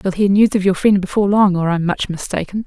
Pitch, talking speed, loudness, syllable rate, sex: 195 Hz, 270 wpm, -16 LUFS, 6.4 syllables/s, female